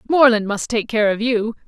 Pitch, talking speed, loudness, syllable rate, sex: 225 Hz, 215 wpm, -18 LUFS, 5.0 syllables/s, female